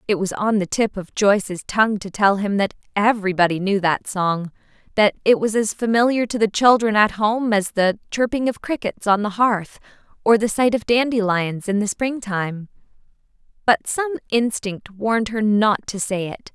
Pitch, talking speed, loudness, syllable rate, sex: 210 Hz, 190 wpm, -20 LUFS, 4.8 syllables/s, female